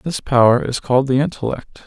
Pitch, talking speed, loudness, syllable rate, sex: 135 Hz, 195 wpm, -17 LUFS, 5.5 syllables/s, male